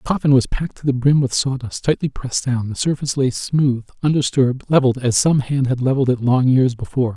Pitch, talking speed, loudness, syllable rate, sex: 130 Hz, 225 wpm, -18 LUFS, 6.3 syllables/s, male